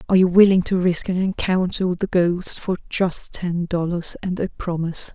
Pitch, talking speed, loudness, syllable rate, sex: 180 Hz, 200 wpm, -21 LUFS, 5.1 syllables/s, female